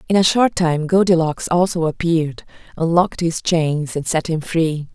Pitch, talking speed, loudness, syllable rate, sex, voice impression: 165 Hz, 170 wpm, -18 LUFS, 4.8 syllables/s, female, very feminine, very adult-like, slightly thin, slightly relaxed, slightly weak, bright, very clear, fluent, slightly raspy, slightly cute, cool, very intellectual, refreshing, sincere, calm, very friendly, very reassuring, unique, very elegant, sweet, lively, very kind, slightly intense, slightly modest, slightly light